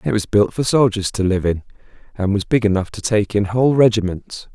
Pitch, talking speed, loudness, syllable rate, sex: 105 Hz, 225 wpm, -18 LUFS, 5.6 syllables/s, male